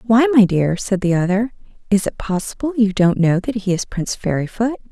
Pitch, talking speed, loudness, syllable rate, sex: 210 Hz, 205 wpm, -18 LUFS, 5.4 syllables/s, female